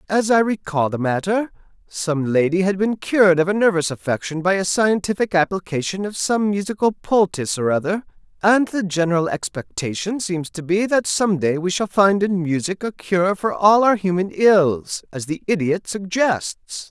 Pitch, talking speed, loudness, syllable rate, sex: 185 Hz, 175 wpm, -19 LUFS, 4.8 syllables/s, male